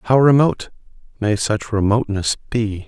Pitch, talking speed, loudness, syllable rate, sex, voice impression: 110 Hz, 125 wpm, -18 LUFS, 5.0 syllables/s, male, masculine, adult-like, relaxed, slightly weak, slightly dark, muffled, raspy, sincere, calm, kind, modest